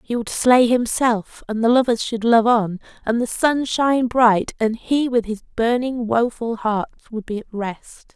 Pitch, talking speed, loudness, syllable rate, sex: 235 Hz, 190 wpm, -19 LUFS, 4.2 syllables/s, female